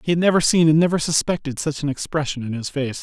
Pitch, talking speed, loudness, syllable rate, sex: 150 Hz, 260 wpm, -20 LUFS, 6.5 syllables/s, male